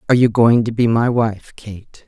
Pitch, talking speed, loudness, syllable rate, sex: 115 Hz, 230 wpm, -15 LUFS, 4.8 syllables/s, female